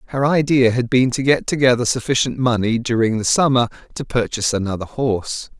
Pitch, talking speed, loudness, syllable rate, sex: 120 Hz, 170 wpm, -18 LUFS, 5.8 syllables/s, male